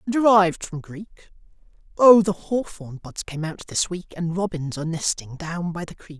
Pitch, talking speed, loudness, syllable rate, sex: 175 Hz, 185 wpm, -22 LUFS, 4.6 syllables/s, male